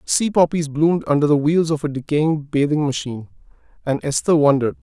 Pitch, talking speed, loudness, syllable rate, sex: 150 Hz, 170 wpm, -18 LUFS, 5.8 syllables/s, male